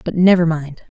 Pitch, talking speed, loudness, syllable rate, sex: 165 Hz, 180 wpm, -15 LUFS, 4.9 syllables/s, female